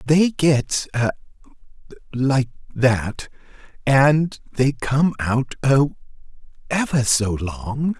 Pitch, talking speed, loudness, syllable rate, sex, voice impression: 135 Hz, 75 wpm, -20 LUFS, 2.8 syllables/s, male, masculine, adult-like, middle-aged, thick, tensed, powerful, cool, sincere, calm, mature, reassuring, wild, lively